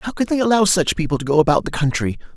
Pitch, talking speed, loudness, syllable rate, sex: 170 Hz, 280 wpm, -18 LUFS, 7.0 syllables/s, male